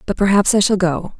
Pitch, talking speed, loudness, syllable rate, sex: 190 Hz, 250 wpm, -15 LUFS, 5.8 syllables/s, female